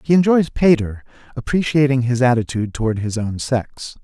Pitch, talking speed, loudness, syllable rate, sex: 125 Hz, 150 wpm, -18 LUFS, 5.3 syllables/s, male